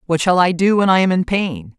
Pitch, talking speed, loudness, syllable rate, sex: 180 Hz, 305 wpm, -16 LUFS, 5.5 syllables/s, female